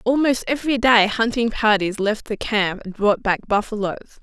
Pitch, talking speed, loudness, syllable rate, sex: 220 Hz, 170 wpm, -20 LUFS, 5.1 syllables/s, female